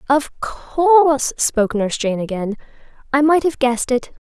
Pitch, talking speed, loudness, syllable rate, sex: 265 Hz, 155 wpm, -17 LUFS, 4.8 syllables/s, female